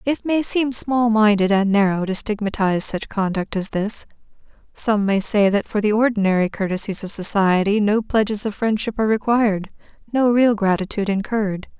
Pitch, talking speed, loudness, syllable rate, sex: 210 Hz, 170 wpm, -19 LUFS, 5.3 syllables/s, female